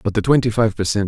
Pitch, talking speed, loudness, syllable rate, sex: 110 Hz, 335 wpm, -18 LUFS, 6.9 syllables/s, male